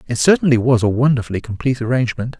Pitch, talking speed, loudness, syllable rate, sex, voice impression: 125 Hz, 175 wpm, -17 LUFS, 7.6 syllables/s, male, masculine, adult-like, slightly thick, slightly fluent, slightly refreshing, sincere, slightly elegant